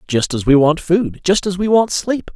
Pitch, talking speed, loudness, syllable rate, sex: 175 Hz, 255 wpm, -16 LUFS, 4.6 syllables/s, male